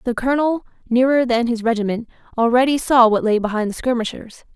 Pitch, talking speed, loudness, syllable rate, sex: 240 Hz, 170 wpm, -18 LUFS, 5.9 syllables/s, female